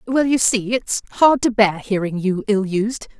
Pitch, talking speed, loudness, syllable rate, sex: 215 Hz, 190 wpm, -18 LUFS, 4.4 syllables/s, female